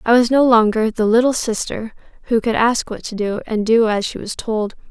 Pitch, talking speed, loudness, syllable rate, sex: 225 Hz, 235 wpm, -17 LUFS, 5.2 syllables/s, female